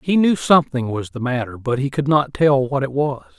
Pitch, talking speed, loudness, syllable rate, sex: 135 Hz, 250 wpm, -19 LUFS, 5.4 syllables/s, male